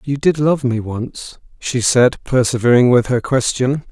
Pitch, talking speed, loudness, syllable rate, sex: 125 Hz, 170 wpm, -16 LUFS, 4.2 syllables/s, male